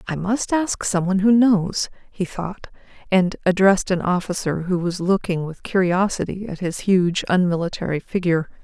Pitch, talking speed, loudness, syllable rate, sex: 185 Hz, 155 wpm, -21 LUFS, 5.0 syllables/s, female